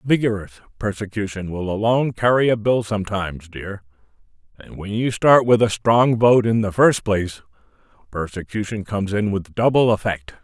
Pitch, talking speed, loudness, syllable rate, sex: 105 Hz, 155 wpm, -19 LUFS, 5.3 syllables/s, male